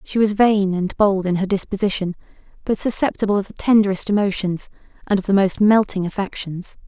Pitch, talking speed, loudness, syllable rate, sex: 195 Hz, 175 wpm, -19 LUFS, 5.7 syllables/s, female